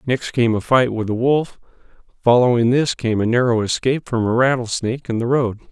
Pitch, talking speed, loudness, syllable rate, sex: 120 Hz, 200 wpm, -18 LUFS, 5.6 syllables/s, male